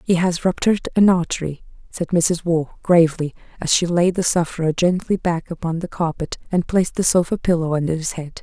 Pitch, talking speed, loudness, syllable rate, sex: 170 Hz, 190 wpm, -19 LUFS, 5.8 syllables/s, female